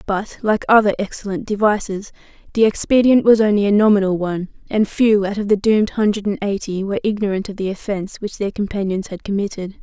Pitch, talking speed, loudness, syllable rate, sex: 205 Hz, 190 wpm, -18 LUFS, 6.1 syllables/s, female